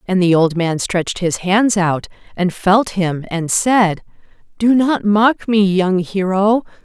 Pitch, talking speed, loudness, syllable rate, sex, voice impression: 195 Hz, 165 wpm, -16 LUFS, 3.7 syllables/s, female, feminine, adult-like, intellectual, slightly sharp